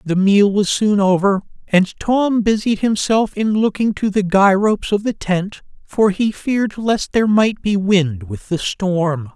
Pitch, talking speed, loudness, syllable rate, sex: 200 Hz, 185 wpm, -17 LUFS, 4.1 syllables/s, male